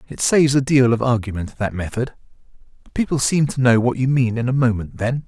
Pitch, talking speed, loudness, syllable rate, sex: 125 Hz, 215 wpm, -19 LUFS, 5.8 syllables/s, male